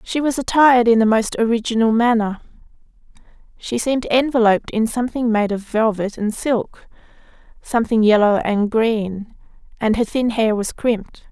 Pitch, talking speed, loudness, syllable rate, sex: 225 Hz, 150 wpm, -18 LUFS, 5.1 syllables/s, female